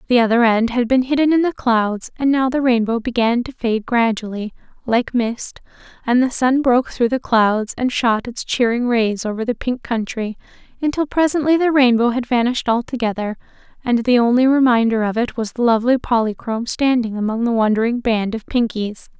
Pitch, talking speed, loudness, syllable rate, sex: 240 Hz, 185 wpm, -18 LUFS, 5.3 syllables/s, female